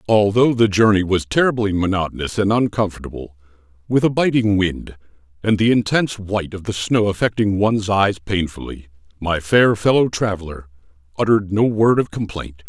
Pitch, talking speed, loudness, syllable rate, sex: 100 Hz, 150 wpm, -18 LUFS, 5.4 syllables/s, male